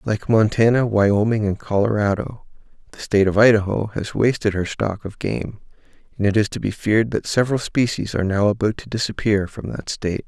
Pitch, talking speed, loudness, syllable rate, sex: 105 Hz, 185 wpm, -20 LUFS, 5.6 syllables/s, male